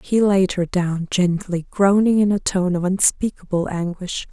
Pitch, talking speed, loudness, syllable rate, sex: 185 Hz, 165 wpm, -19 LUFS, 4.4 syllables/s, female